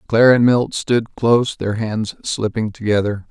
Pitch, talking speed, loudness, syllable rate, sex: 110 Hz, 165 wpm, -17 LUFS, 4.6 syllables/s, male